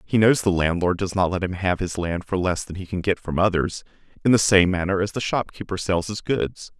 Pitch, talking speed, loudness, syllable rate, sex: 95 Hz, 255 wpm, -22 LUFS, 5.5 syllables/s, male